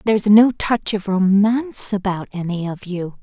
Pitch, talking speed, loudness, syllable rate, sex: 200 Hz, 170 wpm, -18 LUFS, 4.6 syllables/s, female